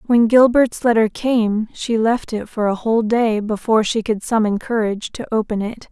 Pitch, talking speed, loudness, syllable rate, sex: 220 Hz, 195 wpm, -18 LUFS, 5.0 syllables/s, female